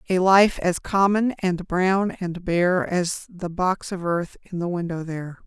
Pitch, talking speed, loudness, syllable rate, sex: 180 Hz, 185 wpm, -22 LUFS, 3.9 syllables/s, female